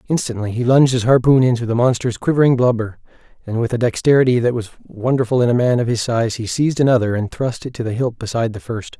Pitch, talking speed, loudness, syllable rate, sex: 120 Hz, 235 wpm, -17 LUFS, 6.6 syllables/s, male